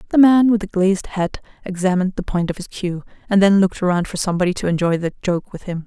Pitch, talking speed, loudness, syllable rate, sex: 185 Hz, 245 wpm, -18 LUFS, 6.8 syllables/s, female